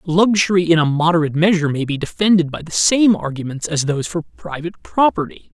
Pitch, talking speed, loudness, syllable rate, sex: 165 Hz, 180 wpm, -17 LUFS, 6.1 syllables/s, male